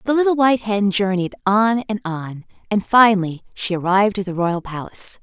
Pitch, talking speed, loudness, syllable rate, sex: 200 Hz, 185 wpm, -19 LUFS, 5.5 syllables/s, female